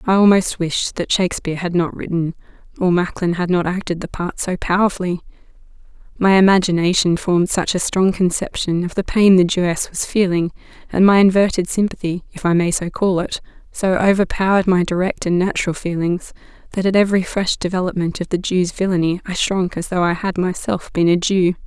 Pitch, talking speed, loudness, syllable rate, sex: 180 Hz, 185 wpm, -18 LUFS, 5.6 syllables/s, female